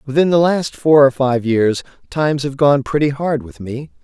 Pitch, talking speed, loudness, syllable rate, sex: 140 Hz, 210 wpm, -15 LUFS, 4.7 syllables/s, male